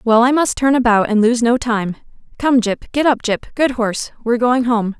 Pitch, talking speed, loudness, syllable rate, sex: 240 Hz, 230 wpm, -16 LUFS, 5.3 syllables/s, female